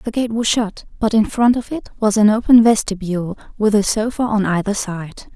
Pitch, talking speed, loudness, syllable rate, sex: 215 Hz, 215 wpm, -17 LUFS, 5.2 syllables/s, female